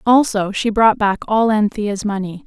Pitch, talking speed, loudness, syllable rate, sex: 210 Hz, 170 wpm, -17 LUFS, 4.3 syllables/s, female